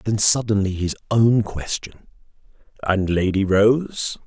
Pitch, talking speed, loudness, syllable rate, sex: 110 Hz, 100 wpm, -20 LUFS, 3.8 syllables/s, male